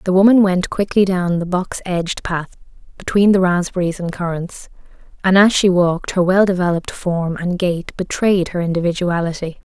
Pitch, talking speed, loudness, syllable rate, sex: 180 Hz, 160 wpm, -17 LUFS, 5.2 syllables/s, female